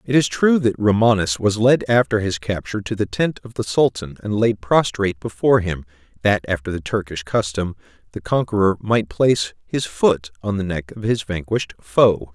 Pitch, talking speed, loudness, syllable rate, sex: 105 Hz, 190 wpm, -20 LUFS, 5.1 syllables/s, male